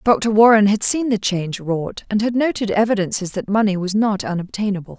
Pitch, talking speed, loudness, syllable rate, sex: 205 Hz, 195 wpm, -18 LUFS, 5.6 syllables/s, female